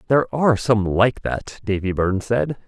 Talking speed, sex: 180 wpm, male